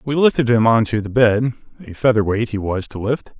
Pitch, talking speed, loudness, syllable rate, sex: 115 Hz, 210 wpm, -18 LUFS, 5.4 syllables/s, male